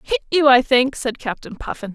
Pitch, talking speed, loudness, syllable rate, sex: 265 Hz, 215 wpm, -18 LUFS, 5.2 syllables/s, female